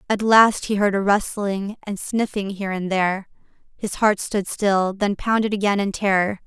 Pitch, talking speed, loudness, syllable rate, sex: 200 Hz, 185 wpm, -21 LUFS, 4.7 syllables/s, female